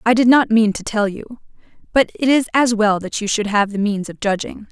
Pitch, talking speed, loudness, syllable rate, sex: 215 Hz, 255 wpm, -17 LUFS, 5.3 syllables/s, female